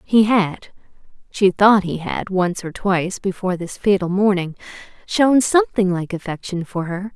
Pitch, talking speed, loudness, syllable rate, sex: 195 Hz, 150 wpm, -19 LUFS, 4.7 syllables/s, female